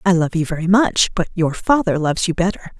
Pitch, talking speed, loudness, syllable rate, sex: 175 Hz, 235 wpm, -18 LUFS, 6.0 syllables/s, female